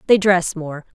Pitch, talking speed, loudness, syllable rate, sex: 175 Hz, 185 wpm, -17 LUFS, 4.3 syllables/s, female